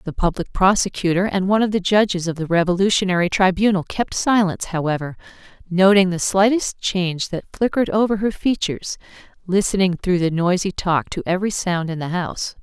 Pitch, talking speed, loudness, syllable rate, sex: 185 Hz, 165 wpm, -19 LUFS, 5.9 syllables/s, female